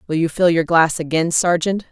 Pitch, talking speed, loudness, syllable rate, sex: 165 Hz, 220 wpm, -17 LUFS, 5.3 syllables/s, female